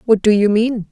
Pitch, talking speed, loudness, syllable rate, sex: 215 Hz, 265 wpm, -14 LUFS, 5.1 syllables/s, female